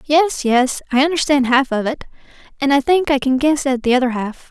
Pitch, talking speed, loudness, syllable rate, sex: 270 Hz, 225 wpm, -16 LUFS, 5.3 syllables/s, female